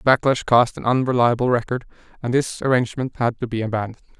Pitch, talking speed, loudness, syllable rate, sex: 120 Hz, 170 wpm, -20 LUFS, 6.6 syllables/s, male